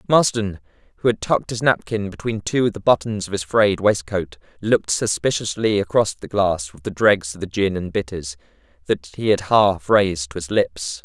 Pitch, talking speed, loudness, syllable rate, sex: 100 Hz, 195 wpm, -20 LUFS, 5.1 syllables/s, male